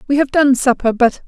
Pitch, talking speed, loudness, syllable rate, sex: 265 Hz, 235 wpm, -14 LUFS, 5.6 syllables/s, female